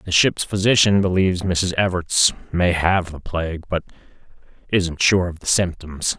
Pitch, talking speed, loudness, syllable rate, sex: 90 Hz, 155 wpm, -19 LUFS, 4.6 syllables/s, male